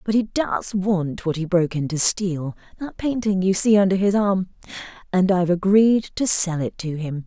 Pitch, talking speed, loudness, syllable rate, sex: 190 Hz, 190 wpm, -20 LUFS, 4.8 syllables/s, female